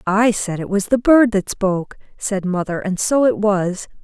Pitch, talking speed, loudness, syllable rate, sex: 205 Hz, 210 wpm, -18 LUFS, 4.5 syllables/s, female